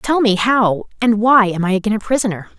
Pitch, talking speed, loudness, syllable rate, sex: 220 Hz, 230 wpm, -15 LUFS, 5.5 syllables/s, female